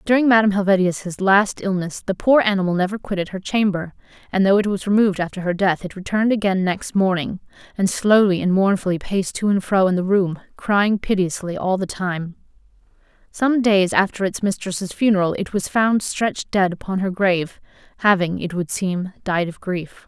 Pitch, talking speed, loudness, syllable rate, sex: 190 Hz, 185 wpm, -20 LUFS, 5.4 syllables/s, female